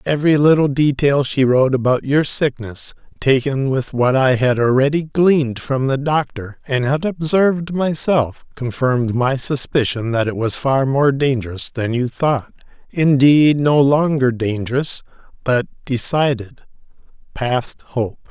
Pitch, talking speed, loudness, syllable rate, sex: 135 Hz, 140 wpm, -17 LUFS, 4.3 syllables/s, male